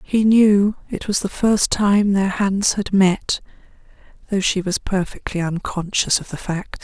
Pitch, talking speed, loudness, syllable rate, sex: 195 Hz, 165 wpm, -19 LUFS, 4.0 syllables/s, female